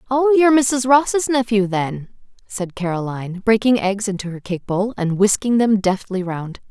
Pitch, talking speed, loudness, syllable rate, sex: 215 Hz, 170 wpm, -18 LUFS, 4.7 syllables/s, female